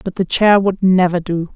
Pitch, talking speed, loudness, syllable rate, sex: 185 Hz, 230 wpm, -15 LUFS, 4.8 syllables/s, female